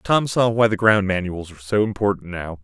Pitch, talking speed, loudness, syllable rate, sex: 100 Hz, 230 wpm, -20 LUFS, 5.6 syllables/s, male